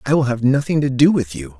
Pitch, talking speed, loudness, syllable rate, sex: 130 Hz, 300 wpm, -17 LUFS, 6.1 syllables/s, male